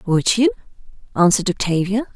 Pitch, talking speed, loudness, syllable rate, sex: 195 Hz, 110 wpm, -18 LUFS, 6.4 syllables/s, female